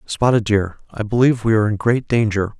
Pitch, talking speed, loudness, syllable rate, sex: 110 Hz, 210 wpm, -17 LUFS, 6.1 syllables/s, male